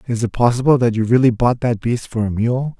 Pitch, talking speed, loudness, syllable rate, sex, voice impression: 120 Hz, 260 wpm, -17 LUFS, 5.7 syllables/s, male, masculine, adult-like, cool, intellectual, calm, slightly friendly